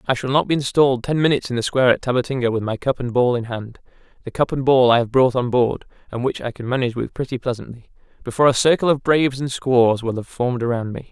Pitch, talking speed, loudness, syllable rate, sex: 125 Hz, 250 wpm, -19 LUFS, 6.7 syllables/s, male